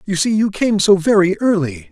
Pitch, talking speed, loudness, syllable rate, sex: 195 Hz, 220 wpm, -15 LUFS, 5.1 syllables/s, male